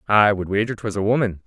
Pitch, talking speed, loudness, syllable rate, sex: 105 Hz, 245 wpm, -20 LUFS, 6.1 syllables/s, male